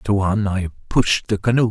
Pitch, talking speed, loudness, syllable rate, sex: 105 Hz, 175 wpm, -20 LUFS, 5.0 syllables/s, male